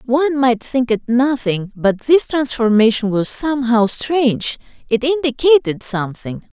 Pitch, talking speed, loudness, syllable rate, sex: 250 Hz, 130 wpm, -16 LUFS, 4.5 syllables/s, female